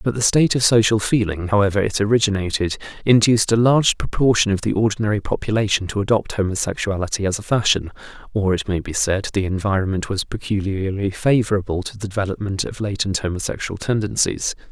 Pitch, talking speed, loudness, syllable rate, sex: 105 Hz, 165 wpm, -20 LUFS, 6.2 syllables/s, male